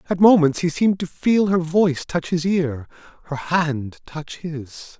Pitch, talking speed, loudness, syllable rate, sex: 165 Hz, 180 wpm, -20 LUFS, 4.3 syllables/s, male